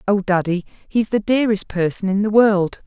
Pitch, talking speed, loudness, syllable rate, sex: 200 Hz, 190 wpm, -18 LUFS, 5.1 syllables/s, female